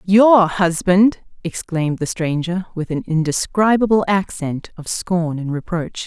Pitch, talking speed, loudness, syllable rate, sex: 180 Hz, 130 wpm, -18 LUFS, 4.1 syllables/s, female